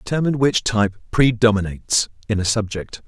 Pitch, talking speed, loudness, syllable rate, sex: 110 Hz, 135 wpm, -19 LUFS, 6.1 syllables/s, male